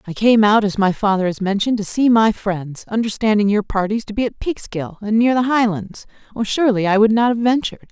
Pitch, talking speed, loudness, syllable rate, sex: 215 Hz, 225 wpm, -17 LUFS, 5.8 syllables/s, female